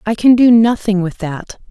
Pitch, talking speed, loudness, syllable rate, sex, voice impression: 210 Hz, 210 wpm, -12 LUFS, 4.7 syllables/s, female, feminine, middle-aged, tensed, powerful, muffled, raspy, intellectual, calm, friendly, reassuring, elegant, kind, modest